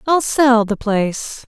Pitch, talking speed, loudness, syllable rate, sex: 240 Hz, 160 wpm, -16 LUFS, 3.8 syllables/s, female